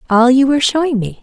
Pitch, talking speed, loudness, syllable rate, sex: 255 Hz, 245 wpm, -13 LUFS, 6.8 syllables/s, female